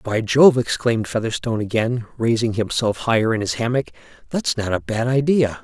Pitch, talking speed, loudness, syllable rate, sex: 115 Hz, 170 wpm, -20 LUFS, 5.4 syllables/s, male